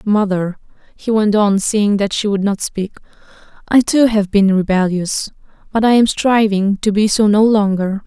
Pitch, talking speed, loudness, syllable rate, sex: 205 Hz, 180 wpm, -15 LUFS, 4.5 syllables/s, female